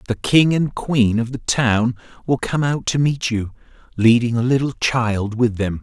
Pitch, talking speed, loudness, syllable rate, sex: 120 Hz, 195 wpm, -18 LUFS, 4.3 syllables/s, male